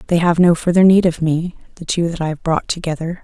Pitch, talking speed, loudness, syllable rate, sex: 170 Hz, 260 wpm, -16 LUFS, 6.1 syllables/s, female